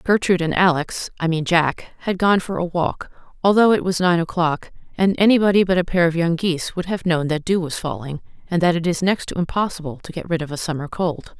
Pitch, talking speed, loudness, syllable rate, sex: 175 Hz, 225 wpm, -20 LUFS, 5.8 syllables/s, female